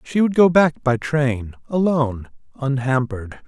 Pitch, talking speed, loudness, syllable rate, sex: 135 Hz, 140 wpm, -19 LUFS, 4.5 syllables/s, male